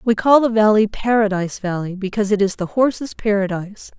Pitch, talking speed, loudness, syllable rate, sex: 210 Hz, 180 wpm, -18 LUFS, 6.0 syllables/s, female